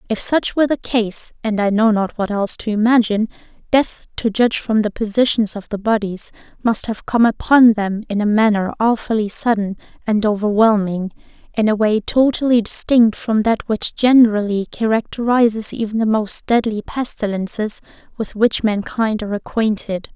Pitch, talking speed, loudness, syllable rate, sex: 220 Hz, 160 wpm, -17 LUFS, 4.6 syllables/s, female